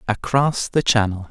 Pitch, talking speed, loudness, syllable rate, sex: 115 Hz, 140 wpm, -19 LUFS, 4.4 syllables/s, male